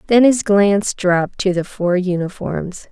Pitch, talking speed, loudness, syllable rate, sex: 190 Hz, 165 wpm, -17 LUFS, 4.4 syllables/s, female